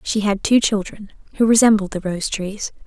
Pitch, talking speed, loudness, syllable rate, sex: 205 Hz, 190 wpm, -18 LUFS, 5.0 syllables/s, female